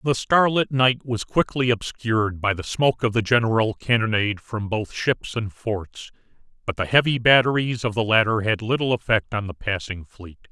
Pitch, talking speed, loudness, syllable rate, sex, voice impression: 115 Hz, 185 wpm, -21 LUFS, 5.0 syllables/s, male, masculine, adult-like, tensed, powerful, clear, cool, intellectual, mature, friendly, wild, lively, strict